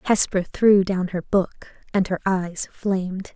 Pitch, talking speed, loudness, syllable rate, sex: 190 Hz, 160 wpm, -22 LUFS, 3.7 syllables/s, female